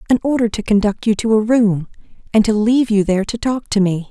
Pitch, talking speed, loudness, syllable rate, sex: 215 Hz, 250 wpm, -16 LUFS, 6.1 syllables/s, female